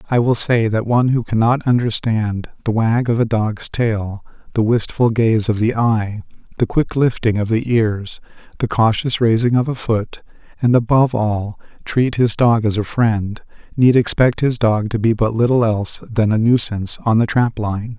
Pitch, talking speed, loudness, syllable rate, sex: 115 Hz, 190 wpm, -17 LUFS, 4.6 syllables/s, male